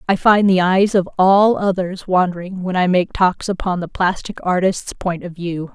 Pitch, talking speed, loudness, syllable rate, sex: 185 Hz, 200 wpm, -17 LUFS, 4.6 syllables/s, female